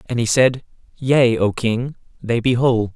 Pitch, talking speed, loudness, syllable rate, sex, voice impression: 120 Hz, 185 wpm, -18 LUFS, 4.4 syllables/s, male, masculine, adult-like, tensed, powerful, bright, clear, slightly halting, intellectual, calm, friendly, lively, slightly kind